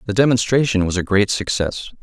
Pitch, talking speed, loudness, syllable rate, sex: 105 Hz, 180 wpm, -18 LUFS, 5.6 syllables/s, male